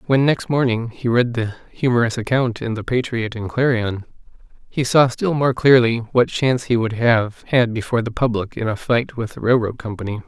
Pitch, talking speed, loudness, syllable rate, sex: 120 Hz, 200 wpm, -19 LUFS, 5.3 syllables/s, male